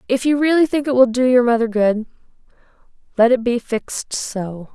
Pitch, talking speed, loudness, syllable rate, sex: 245 Hz, 190 wpm, -17 LUFS, 5.2 syllables/s, female